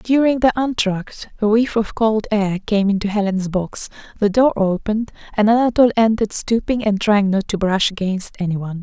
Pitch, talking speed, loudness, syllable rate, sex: 210 Hz, 175 wpm, -18 LUFS, 5.4 syllables/s, female